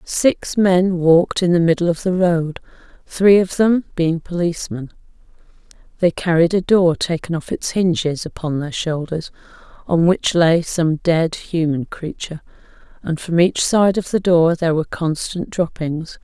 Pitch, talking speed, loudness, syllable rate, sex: 170 Hz, 160 wpm, -18 LUFS, 4.5 syllables/s, female